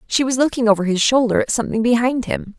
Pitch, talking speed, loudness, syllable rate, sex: 235 Hz, 230 wpm, -17 LUFS, 6.5 syllables/s, female